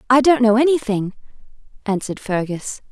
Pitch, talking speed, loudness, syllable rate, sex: 230 Hz, 125 wpm, -18 LUFS, 5.6 syllables/s, female